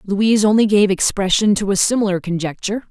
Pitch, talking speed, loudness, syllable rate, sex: 200 Hz, 165 wpm, -16 LUFS, 6.3 syllables/s, female